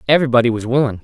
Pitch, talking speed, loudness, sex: 125 Hz, 175 wpm, -15 LUFS, male